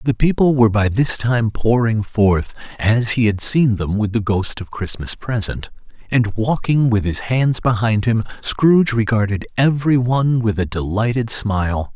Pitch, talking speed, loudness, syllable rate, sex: 115 Hz, 170 wpm, -18 LUFS, 4.6 syllables/s, male